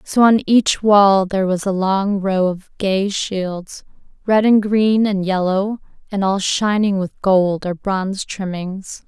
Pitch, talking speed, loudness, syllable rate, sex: 195 Hz, 165 wpm, -17 LUFS, 3.7 syllables/s, female